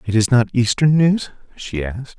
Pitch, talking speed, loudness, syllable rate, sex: 125 Hz, 190 wpm, -17 LUFS, 5.0 syllables/s, male